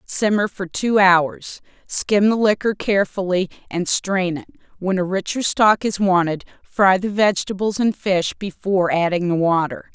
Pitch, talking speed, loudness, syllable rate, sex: 190 Hz, 155 wpm, -19 LUFS, 4.6 syllables/s, female